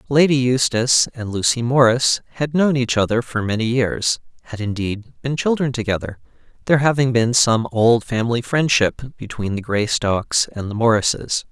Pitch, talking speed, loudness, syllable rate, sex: 120 Hz, 145 wpm, -18 LUFS, 4.8 syllables/s, male